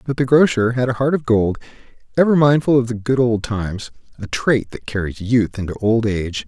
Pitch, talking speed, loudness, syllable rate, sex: 120 Hz, 205 wpm, -18 LUFS, 5.5 syllables/s, male